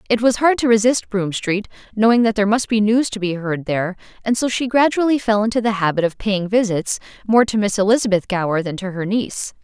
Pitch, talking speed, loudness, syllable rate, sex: 210 Hz, 230 wpm, -18 LUFS, 6.1 syllables/s, female